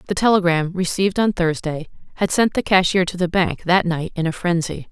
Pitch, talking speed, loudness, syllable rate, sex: 180 Hz, 205 wpm, -19 LUFS, 5.5 syllables/s, female